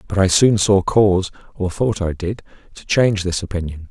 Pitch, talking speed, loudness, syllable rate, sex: 95 Hz, 170 wpm, -18 LUFS, 5.3 syllables/s, male